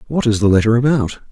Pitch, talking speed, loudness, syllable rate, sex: 120 Hz, 230 wpm, -15 LUFS, 6.5 syllables/s, male